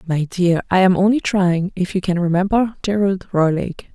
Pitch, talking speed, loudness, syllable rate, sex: 185 Hz, 185 wpm, -18 LUFS, 5.1 syllables/s, female